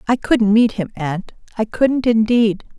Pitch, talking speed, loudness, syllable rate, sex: 220 Hz, 170 wpm, -17 LUFS, 4.0 syllables/s, female